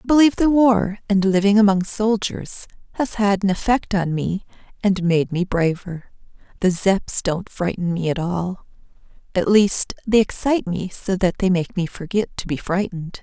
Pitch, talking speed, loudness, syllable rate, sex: 195 Hz, 170 wpm, -20 LUFS, 4.8 syllables/s, female